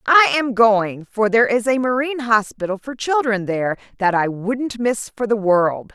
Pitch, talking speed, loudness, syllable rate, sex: 225 Hz, 190 wpm, -18 LUFS, 4.7 syllables/s, female